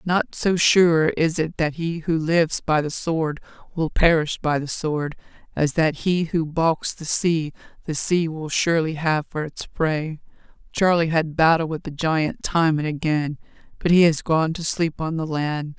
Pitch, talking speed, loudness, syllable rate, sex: 160 Hz, 190 wpm, -21 LUFS, 4.2 syllables/s, female